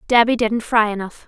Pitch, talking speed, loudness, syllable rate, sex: 225 Hz, 190 wpm, -17 LUFS, 5.4 syllables/s, female